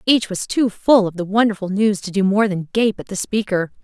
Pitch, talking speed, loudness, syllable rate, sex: 200 Hz, 250 wpm, -18 LUFS, 5.3 syllables/s, female